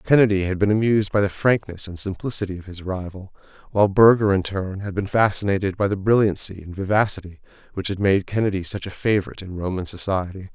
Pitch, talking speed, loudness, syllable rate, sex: 100 Hz, 195 wpm, -21 LUFS, 6.4 syllables/s, male